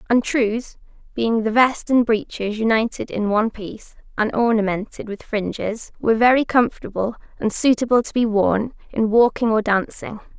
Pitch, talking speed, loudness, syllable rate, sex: 225 Hz, 155 wpm, -20 LUFS, 5.0 syllables/s, female